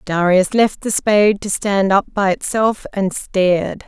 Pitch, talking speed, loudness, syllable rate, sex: 200 Hz, 170 wpm, -16 LUFS, 4.1 syllables/s, female